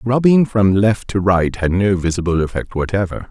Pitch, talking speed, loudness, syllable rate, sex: 100 Hz, 180 wpm, -16 LUFS, 5.0 syllables/s, male